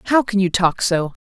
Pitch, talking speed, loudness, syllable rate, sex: 195 Hz, 245 wpm, -18 LUFS, 5.3 syllables/s, female